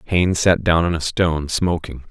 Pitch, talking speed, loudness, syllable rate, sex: 85 Hz, 200 wpm, -19 LUFS, 5.1 syllables/s, male